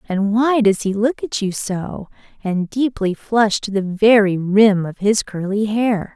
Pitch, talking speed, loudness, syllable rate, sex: 210 Hz, 185 wpm, -17 LUFS, 3.9 syllables/s, female